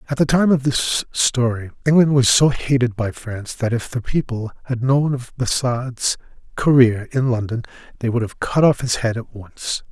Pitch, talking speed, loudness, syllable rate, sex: 125 Hz, 195 wpm, -19 LUFS, 4.7 syllables/s, male